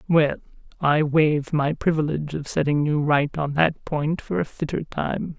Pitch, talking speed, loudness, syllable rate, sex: 150 Hz, 180 wpm, -23 LUFS, 4.6 syllables/s, female